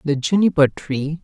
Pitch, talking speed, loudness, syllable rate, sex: 150 Hz, 145 wpm, -18 LUFS, 4.4 syllables/s, male